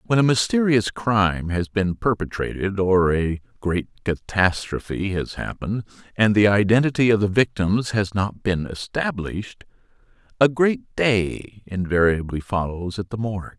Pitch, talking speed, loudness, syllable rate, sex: 100 Hz, 135 wpm, -22 LUFS, 4.4 syllables/s, male